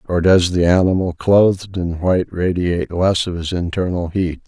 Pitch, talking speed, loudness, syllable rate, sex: 90 Hz, 175 wpm, -17 LUFS, 5.0 syllables/s, male